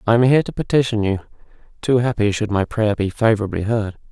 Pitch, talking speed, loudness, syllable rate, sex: 110 Hz, 205 wpm, -19 LUFS, 6.4 syllables/s, male